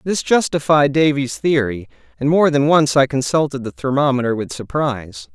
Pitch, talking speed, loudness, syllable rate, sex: 135 Hz, 155 wpm, -17 LUFS, 5.1 syllables/s, male